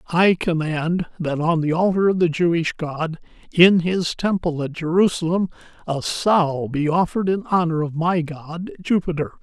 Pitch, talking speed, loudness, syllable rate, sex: 170 Hz, 160 wpm, -20 LUFS, 4.5 syllables/s, male